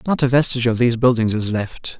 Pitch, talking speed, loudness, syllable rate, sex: 120 Hz, 240 wpm, -18 LUFS, 6.5 syllables/s, male